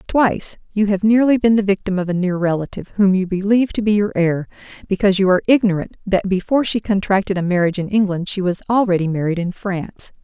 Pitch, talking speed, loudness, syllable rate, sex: 195 Hz, 210 wpm, -18 LUFS, 6.5 syllables/s, female